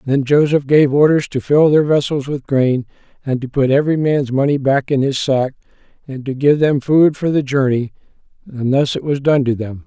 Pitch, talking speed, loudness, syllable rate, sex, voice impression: 140 Hz, 215 wpm, -15 LUFS, 5.1 syllables/s, male, masculine, middle-aged, slightly relaxed, powerful, slightly dark, slightly muffled, slightly raspy, calm, mature, wild, slightly lively, strict